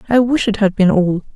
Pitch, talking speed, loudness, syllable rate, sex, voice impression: 210 Hz, 265 wpm, -15 LUFS, 5.5 syllables/s, female, feminine, adult-like, slightly weak, slightly dark, calm, slightly unique